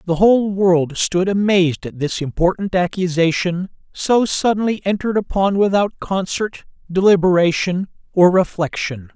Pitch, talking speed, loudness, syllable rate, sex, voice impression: 185 Hz, 120 wpm, -17 LUFS, 4.7 syllables/s, male, masculine, adult-like, slightly bright, slightly clear, unique